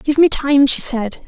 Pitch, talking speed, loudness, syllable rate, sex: 270 Hz, 235 wpm, -15 LUFS, 4.2 syllables/s, female